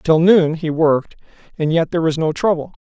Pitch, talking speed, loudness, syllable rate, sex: 165 Hz, 210 wpm, -17 LUFS, 5.7 syllables/s, male